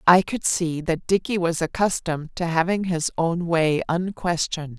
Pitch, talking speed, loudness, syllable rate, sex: 170 Hz, 165 wpm, -23 LUFS, 4.7 syllables/s, female